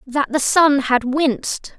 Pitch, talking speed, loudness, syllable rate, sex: 275 Hz, 170 wpm, -17 LUFS, 3.6 syllables/s, female